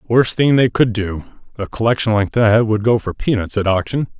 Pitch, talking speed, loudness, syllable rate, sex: 110 Hz, 215 wpm, -16 LUFS, 5.1 syllables/s, male